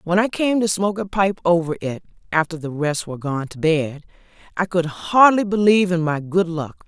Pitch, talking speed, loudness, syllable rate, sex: 175 Hz, 210 wpm, -20 LUFS, 4.3 syllables/s, female